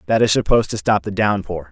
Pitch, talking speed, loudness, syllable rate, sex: 100 Hz, 245 wpm, -18 LUFS, 6.5 syllables/s, male